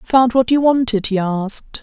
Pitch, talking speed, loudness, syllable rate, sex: 235 Hz, 195 wpm, -16 LUFS, 4.6 syllables/s, female